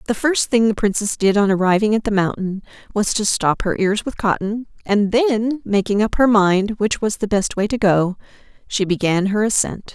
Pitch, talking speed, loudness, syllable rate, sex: 210 Hz, 210 wpm, -18 LUFS, 4.9 syllables/s, female